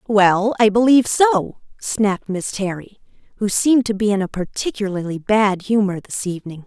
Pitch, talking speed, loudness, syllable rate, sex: 205 Hz, 160 wpm, -18 LUFS, 5.1 syllables/s, female